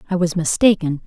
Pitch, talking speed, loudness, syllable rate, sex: 175 Hz, 170 wpm, -17 LUFS, 5.9 syllables/s, female